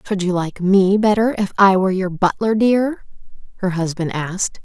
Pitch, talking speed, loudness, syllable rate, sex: 195 Hz, 180 wpm, -17 LUFS, 4.9 syllables/s, female